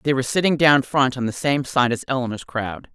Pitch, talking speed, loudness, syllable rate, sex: 130 Hz, 245 wpm, -20 LUFS, 5.7 syllables/s, female